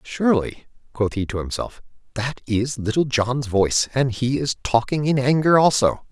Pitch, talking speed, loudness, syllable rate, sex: 125 Hz, 165 wpm, -21 LUFS, 4.8 syllables/s, male